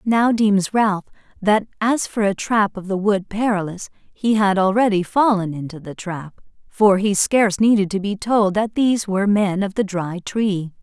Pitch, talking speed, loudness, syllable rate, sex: 200 Hz, 190 wpm, -19 LUFS, 4.5 syllables/s, female